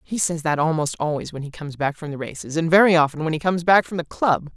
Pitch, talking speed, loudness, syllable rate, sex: 160 Hz, 290 wpm, -21 LUFS, 6.6 syllables/s, female